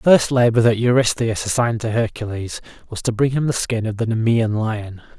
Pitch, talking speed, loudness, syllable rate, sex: 115 Hz, 210 wpm, -19 LUFS, 5.5 syllables/s, male